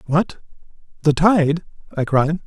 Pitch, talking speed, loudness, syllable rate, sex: 160 Hz, 120 wpm, -19 LUFS, 3.8 syllables/s, male